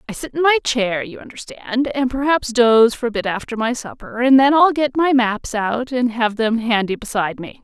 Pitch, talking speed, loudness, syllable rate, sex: 240 Hz, 230 wpm, -17 LUFS, 5.2 syllables/s, female